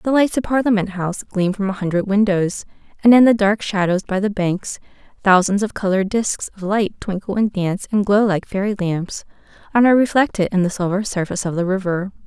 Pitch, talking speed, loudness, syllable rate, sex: 200 Hz, 205 wpm, -18 LUFS, 5.7 syllables/s, female